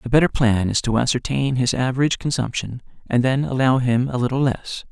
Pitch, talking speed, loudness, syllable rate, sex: 130 Hz, 195 wpm, -20 LUFS, 5.8 syllables/s, male